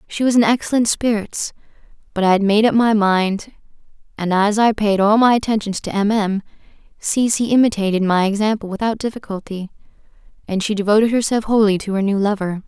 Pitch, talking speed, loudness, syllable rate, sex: 210 Hz, 180 wpm, -17 LUFS, 5.8 syllables/s, female